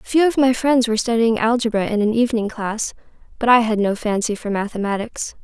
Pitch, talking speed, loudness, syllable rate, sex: 225 Hz, 210 wpm, -19 LUFS, 5.9 syllables/s, female